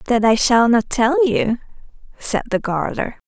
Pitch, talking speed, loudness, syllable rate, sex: 240 Hz, 165 wpm, -18 LUFS, 4.0 syllables/s, female